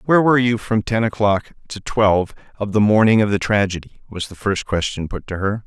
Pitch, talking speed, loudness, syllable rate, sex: 105 Hz, 220 wpm, -18 LUFS, 5.8 syllables/s, male